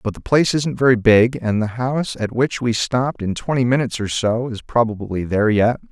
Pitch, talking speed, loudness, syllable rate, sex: 120 Hz, 225 wpm, -18 LUFS, 5.6 syllables/s, male